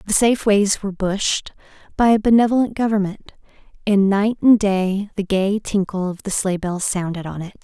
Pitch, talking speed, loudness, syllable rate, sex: 200 Hz, 180 wpm, -19 LUFS, 5.1 syllables/s, female